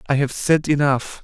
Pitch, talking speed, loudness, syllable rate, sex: 145 Hz, 195 wpm, -19 LUFS, 4.9 syllables/s, male